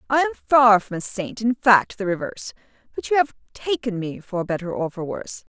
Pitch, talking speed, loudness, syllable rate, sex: 220 Hz, 185 wpm, -21 LUFS, 5.3 syllables/s, female